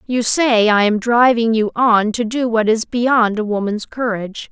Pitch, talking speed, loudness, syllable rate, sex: 225 Hz, 200 wpm, -16 LUFS, 4.4 syllables/s, female